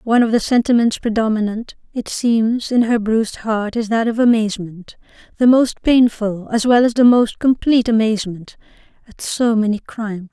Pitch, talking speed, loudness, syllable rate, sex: 225 Hz, 170 wpm, -16 LUFS, 5.2 syllables/s, female